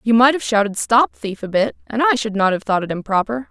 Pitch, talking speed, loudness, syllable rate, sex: 225 Hz, 275 wpm, -18 LUFS, 5.7 syllables/s, female